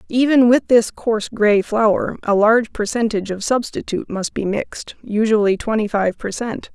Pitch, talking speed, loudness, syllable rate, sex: 220 Hz, 170 wpm, -18 LUFS, 5.0 syllables/s, female